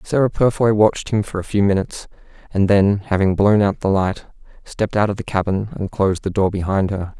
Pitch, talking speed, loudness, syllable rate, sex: 100 Hz, 215 wpm, -18 LUFS, 5.7 syllables/s, male